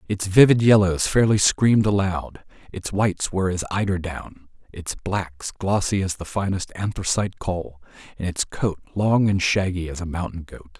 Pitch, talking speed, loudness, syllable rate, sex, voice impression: 95 Hz, 165 wpm, -22 LUFS, 4.8 syllables/s, male, masculine, adult-like, slightly thick, cool, sincere, friendly